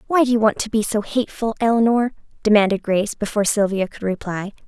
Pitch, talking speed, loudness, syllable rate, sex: 215 Hz, 190 wpm, -20 LUFS, 6.5 syllables/s, female